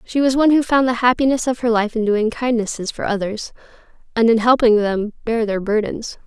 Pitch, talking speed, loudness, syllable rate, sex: 230 Hz, 210 wpm, -18 LUFS, 5.6 syllables/s, female